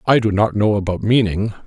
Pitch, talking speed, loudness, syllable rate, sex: 105 Hz, 215 wpm, -17 LUFS, 5.6 syllables/s, male